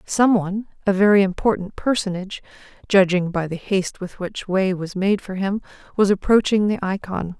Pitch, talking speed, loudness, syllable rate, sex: 195 Hz, 160 wpm, -20 LUFS, 5.3 syllables/s, female